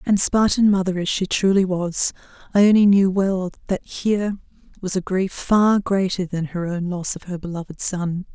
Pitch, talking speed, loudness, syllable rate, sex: 185 Hz, 180 wpm, -20 LUFS, 4.5 syllables/s, female